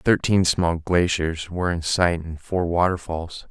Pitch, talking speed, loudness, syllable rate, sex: 85 Hz, 155 wpm, -22 LUFS, 4.0 syllables/s, male